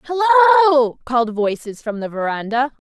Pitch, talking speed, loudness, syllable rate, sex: 265 Hz, 125 wpm, -17 LUFS, 8.2 syllables/s, female